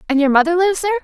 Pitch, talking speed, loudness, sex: 335 Hz, 290 wpm, -15 LUFS, female